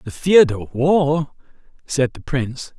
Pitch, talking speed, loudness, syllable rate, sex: 145 Hz, 150 wpm, -18 LUFS, 4.4 syllables/s, male